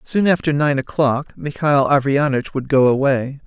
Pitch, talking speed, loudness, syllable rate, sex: 140 Hz, 155 wpm, -17 LUFS, 5.0 syllables/s, male